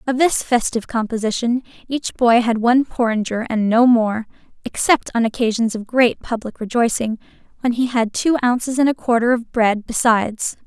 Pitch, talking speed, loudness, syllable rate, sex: 235 Hz, 165 wpm, -18 LUFS, 5.2 syllables/s, female